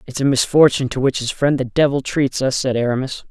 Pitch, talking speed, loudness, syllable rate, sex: 135 Hz, 235 wpm, -17 LUFS, 6.0 syllables/s, male